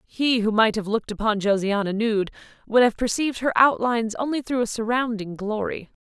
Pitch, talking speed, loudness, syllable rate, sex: 225 Hz, 180 wpm, -23 LUFS, 5.5 syllables/s, female